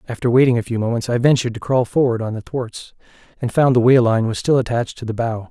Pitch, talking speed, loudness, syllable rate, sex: 120 Hz, 260 wpm, -18 LUFS, 6.8 syllables/s, male